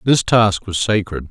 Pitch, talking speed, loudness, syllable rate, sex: 100 Hz, 185 wpm, -16 LUFS, 4.2 syllables/s, male